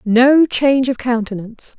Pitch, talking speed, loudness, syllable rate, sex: 245 Hz, 135 wpm, -14 LUFS, 4.8 syllables/s, female